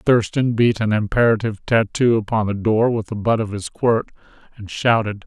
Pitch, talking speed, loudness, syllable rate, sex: 110 Hz, 180 wpm, -19 LUFS, 5.1 syllables/s, male